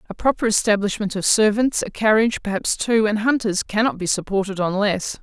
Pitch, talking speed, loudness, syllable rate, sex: 210 Hz, 185 wpm, -20 LUFS, 5.6 syllables/s, female